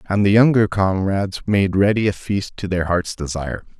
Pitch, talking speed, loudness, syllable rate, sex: 100 Hz, 190 wpm, -19 LUFS, 5.2 syllables/s, male